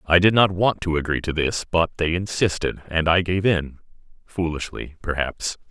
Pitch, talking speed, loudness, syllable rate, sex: 85 Hz, 180 wpm, -22 LUFS, 4.8 syllables/s, male